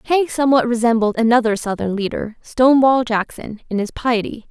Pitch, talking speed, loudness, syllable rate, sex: 235 Hz, 145 wpm, -17 LUFS, 5.4 syllables/s, female